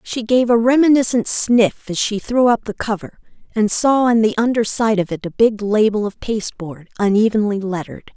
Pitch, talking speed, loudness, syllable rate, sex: 215 Hz, 190 wpm, -17 LUFS, 5.1 syllables/s, female